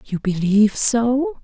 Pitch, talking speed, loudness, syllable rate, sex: 230 Hz, 125 wpm, -17 LUFS, 3.9 syllables/s, female